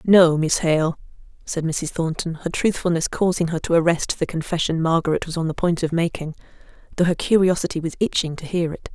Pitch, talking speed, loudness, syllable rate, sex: 165 Hz, 195 wpm, -21 LUFS, 5.6 syllables/s, female